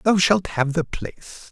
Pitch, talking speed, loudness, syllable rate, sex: 175 Hz, 200 wpm, -21 LUFS, 4.3 syllables/s, male